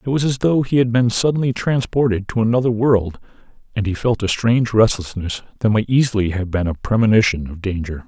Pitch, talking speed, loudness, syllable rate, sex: 110 Hz, 200 wpm, -18 LUFS, 5.8 syllables/s, male